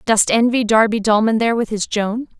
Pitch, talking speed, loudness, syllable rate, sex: 220 Hz, 200 wpm, -16 LUFS, 5.4 syllables/s, female